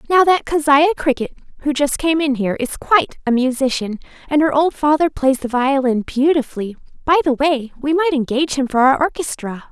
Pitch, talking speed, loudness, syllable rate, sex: 285 Hz, 185 wpm, -17 LUFS, 5.6 syllables/s, female